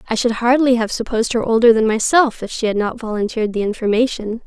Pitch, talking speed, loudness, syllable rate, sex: 230 Hz, 215 wpm, -17 LUFS, 6.4 syllables/s, female